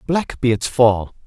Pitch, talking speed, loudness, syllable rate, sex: 120 Hz, 190 wpm, -18 LUFS, 3.9 syllables/s, male